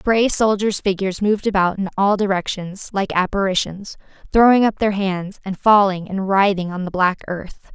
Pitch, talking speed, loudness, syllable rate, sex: 195 Hz, 170 wpm, -18 LUFS, 4.9 syllables/s, female